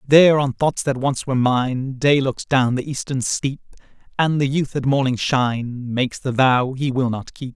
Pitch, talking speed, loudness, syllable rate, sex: 135 Hz, 205 wpm, -20 LUFS, 4.7 syllables/s, male